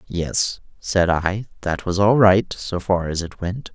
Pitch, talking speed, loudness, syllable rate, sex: 95 Hz, 190 wpm, -20 LUFS, 3.7 syllables/s, male